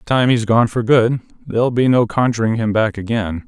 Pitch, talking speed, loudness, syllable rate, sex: 115 Hz, 225 wpm, -16 LUFS, 5.7 syllables/s, male